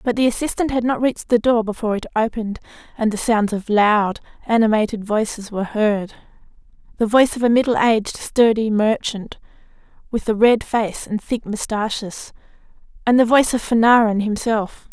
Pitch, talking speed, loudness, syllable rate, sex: 220 Hz, 165 wpm, -18 LUFS, 5.4 syllables/s, female